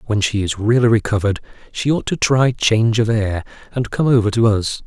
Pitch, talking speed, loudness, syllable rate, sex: 110 Hz, 210 wpm, -17 LUFS, 5.6 syllables/s, male